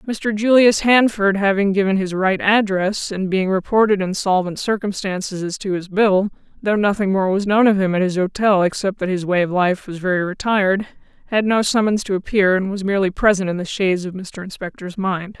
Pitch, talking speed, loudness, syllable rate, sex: 195 Hz, 205 wpm, -18 LUFS, 5.3 syllables/s, female